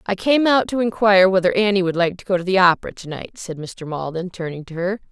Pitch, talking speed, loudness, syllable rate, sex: 190 Hz, 245 wpm, -18 LUFS, 6.2 syllables/s, female